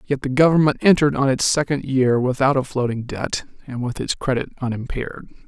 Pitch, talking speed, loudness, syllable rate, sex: 135 Hz, 185 wpm, -20 LUFS, 5.8 syllables/s, male